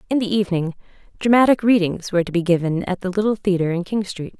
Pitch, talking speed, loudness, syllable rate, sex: 190 Hz, 220 wpm, -20 LUFS, 6.7 syllables/s, female